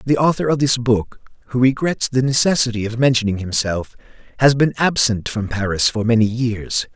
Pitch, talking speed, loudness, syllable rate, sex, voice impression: 120 Hz, 175 wpm, -18 LUFS, 5.1 syllables/s, male, masculine, very adult-like, slightly thick, slightly muffled, cool, slightly sincere, slightly calm